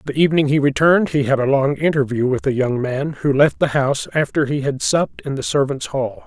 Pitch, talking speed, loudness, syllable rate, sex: 140 Hz, 240 wpm, -18 LUFS, 5.8 syllables/s, male